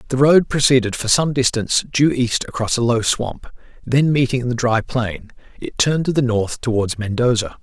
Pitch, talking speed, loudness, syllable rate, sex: 125 Hz, 190 wpm, -18 LUFS, 5.0 syllables/s, male